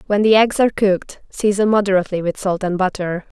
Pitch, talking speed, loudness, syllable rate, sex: 195 Hz, 195 wpm, -17 LUFS, 6.2 syllables/s, female